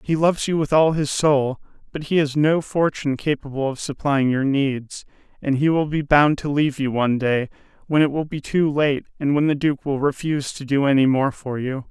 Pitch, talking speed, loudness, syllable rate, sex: 145 Hz, 225 wpm, -20 LUFS, 5.2 syllables/s, male